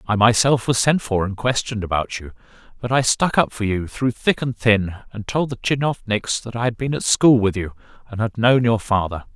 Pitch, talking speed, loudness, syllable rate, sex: 115 Hz, 230 wpm, -20 LUFS, 5.2 syllables/s, male